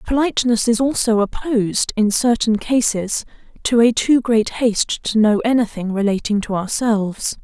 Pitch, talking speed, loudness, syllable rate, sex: 225 Hz, 145 wpm, -18 LUFS, 4.8 syllables/s, female